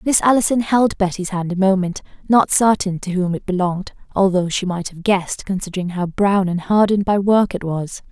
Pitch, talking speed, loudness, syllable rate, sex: 190 Hz, 200 wpm, -18 LUFS, 5.5 syllables/s, female